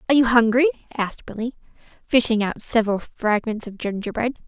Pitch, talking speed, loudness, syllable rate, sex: 230 Hz, 150 wpm, -21 LUFS, 6.0 syllables/s, female